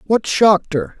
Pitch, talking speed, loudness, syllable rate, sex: 185 Hz, 180 wpm, -15 LUFS, 4.8 syllables/s, male